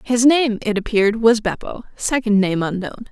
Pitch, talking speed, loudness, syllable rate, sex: 220 Hz, 175 wpm, -18 LUFS, 5.0 syllables/s, female